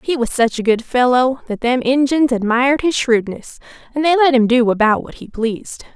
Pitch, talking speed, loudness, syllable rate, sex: 250 Hz, 210 wpm, -16 LUFS, 5.2 syllables/s, female